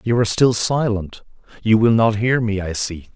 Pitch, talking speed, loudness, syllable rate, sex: 110 Hz, 210 wpm, -18 LUFS, 4.9 syllables/s, male